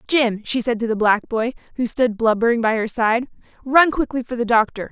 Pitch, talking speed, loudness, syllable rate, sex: 235 Hz, 220 wpm, -19 LUFS, 5.3 syllables/s, female